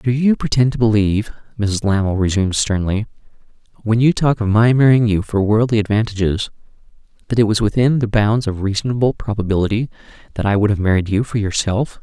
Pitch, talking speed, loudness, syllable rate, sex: 110 Hz, 180 wpm, -17 LUFS, 6.0 syllables/s, male